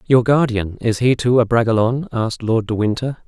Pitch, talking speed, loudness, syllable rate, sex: 115 Hz, 200 wpm, -17 LUFS, 5.7 syllables/s, male